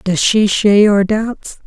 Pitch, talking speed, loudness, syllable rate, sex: 205 Hz, 180 wpm, -12 LUFS, 3.8 syllables/s, female